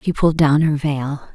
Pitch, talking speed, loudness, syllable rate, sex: 150 Hz, 225 wpm, -18 LUFS, 5.0 syllables/s, female